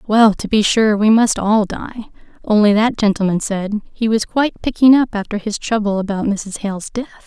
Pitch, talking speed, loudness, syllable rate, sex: 215 Hz, 200 wpm, -16 LUFS, 5.1 syllables/s, female